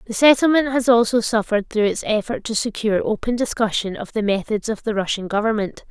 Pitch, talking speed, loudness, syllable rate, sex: 220 Hz, 195 wpm, -20 LUFS, 6.0 syllables/s, female